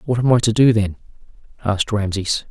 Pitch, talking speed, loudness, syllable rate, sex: 110 Hz, 190 wpm, -18 LUFS, 6.6 syllables/s, male